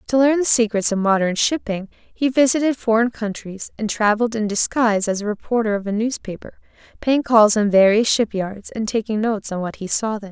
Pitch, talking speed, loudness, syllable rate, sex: 220 Hz, 200 wpm, -19 LUFS, 5.6 syllables/s, female